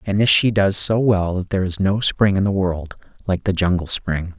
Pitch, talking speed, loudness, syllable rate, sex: 95 Hz, 245 wpm, -18 LUFS, 5.1 syllables/s, male